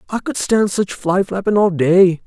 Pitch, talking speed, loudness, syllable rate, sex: 190 Hz, 210 wpm, -16 LUFS, 4.4 syllables/s, male